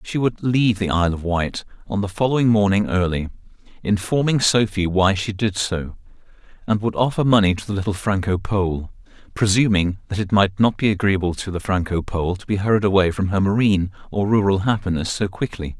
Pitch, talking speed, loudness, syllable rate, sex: 100 Hz, 190 wpm, -20 LUFS, 5.6 syllables/s, male